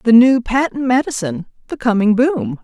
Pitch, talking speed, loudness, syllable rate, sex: 235 Hz, 135 wpm, -15 LUFS, 5.2 syllables/s, female